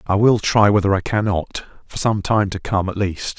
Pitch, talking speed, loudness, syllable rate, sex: 100 Hz, 230 wpm, -18 LUFS, 5.0 syllables/s, male